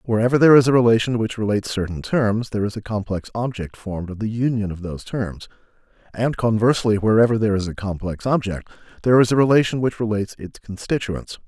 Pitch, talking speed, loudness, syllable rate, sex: 110 Hz, 195 wpm, -20 LUFS, 6.5 syllables/s, male